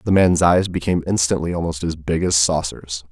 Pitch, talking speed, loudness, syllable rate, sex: 85 Hz, 195 wpm, -19 LUFS, 5.5 syllables/s, male